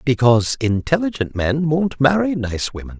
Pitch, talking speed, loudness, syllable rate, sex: 140 Hz, 140 wpm, -18 LUFS, 4.9 syllables/s, male